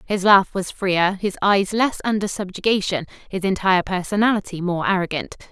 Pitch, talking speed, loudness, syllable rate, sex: 195 Hz, 150 wpm, -20 LUFS, 5.5 syllables/s, female